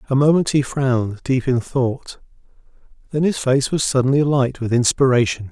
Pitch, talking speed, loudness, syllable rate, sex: 130 Hz, 165 wpm, -18 LUFS, 5.3 syllables/s, male